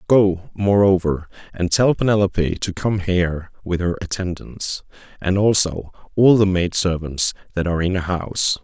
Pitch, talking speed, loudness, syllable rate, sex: 95 Hz, 145 wpm, -19 LUFS, 4.8 syllables/s, male